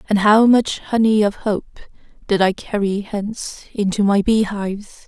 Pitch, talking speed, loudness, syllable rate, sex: 210 Hz, 155 wpm, -18 LUFS, 4.6 syllables/s, female